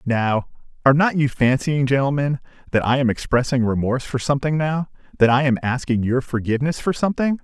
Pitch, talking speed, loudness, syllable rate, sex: 135 Hz, 180 wpm, -20 LUFS, 5.9 syllables/s, male